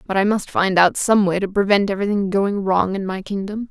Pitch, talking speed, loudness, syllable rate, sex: 195 Hz, 260 wpm, -19 LUFS, 5.6 syllables/s, female